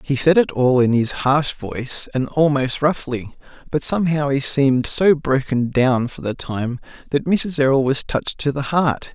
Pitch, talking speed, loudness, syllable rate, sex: 135 Hz, 190 wpm, -19 LUFS, 4.6 syllables/s, male